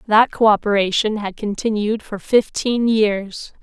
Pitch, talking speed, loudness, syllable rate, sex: 215 Hz, 115 wpm, -18 LUFS, 4.1 syllables/s, female